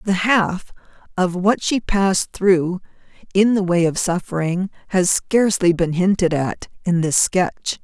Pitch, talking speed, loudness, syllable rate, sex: 185 Hz, 155 wpm, -18 LUFS, 4.1 syllables/s, female